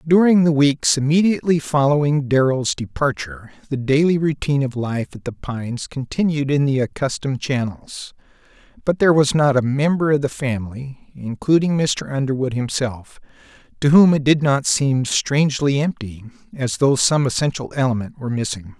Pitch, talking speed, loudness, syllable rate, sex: 140 Hz, 155 wpm, -19 LUFS, 5.2 syllables/s, male